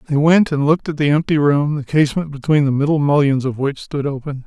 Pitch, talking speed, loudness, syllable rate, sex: 145 Hz, 240 wpm, -17 LUFS, 6.1 syllables/s, male